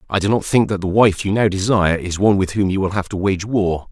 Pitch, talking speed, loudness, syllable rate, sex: 100 Hz, 305 wpm, -17 LUFS, 6.2 syllables/s, male